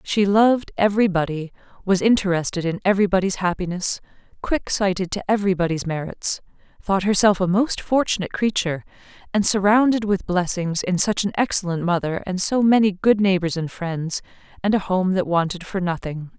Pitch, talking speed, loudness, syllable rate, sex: 190 Hz, 160 wpm, -21 LUFS, 5.6 syllables/s, female